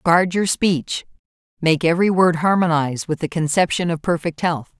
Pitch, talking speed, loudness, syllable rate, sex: 165 Hz, 165 wpm, -19 LUFS, 5.2 syllables/s, female